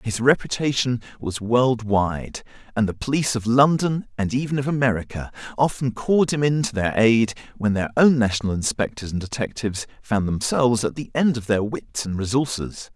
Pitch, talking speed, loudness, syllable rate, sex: 120 Hz, 170 wpm, -22 LUFS, 5.3 syllables/s, male